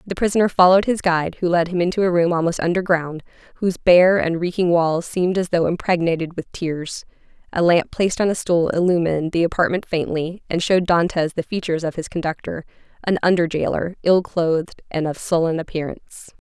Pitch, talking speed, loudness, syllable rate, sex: 170 Hz, 190 wpm, -19 LUFS, 5.9 syllables/s, female